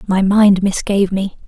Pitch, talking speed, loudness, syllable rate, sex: 195 Hz, 165 wpm, -14 LUFS, 4.7 syllables/s, female